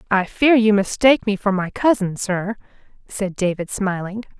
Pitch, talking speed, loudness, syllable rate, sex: 205 Hz, 165 wpm, -19 LUFS, 4.8 syllables/s, female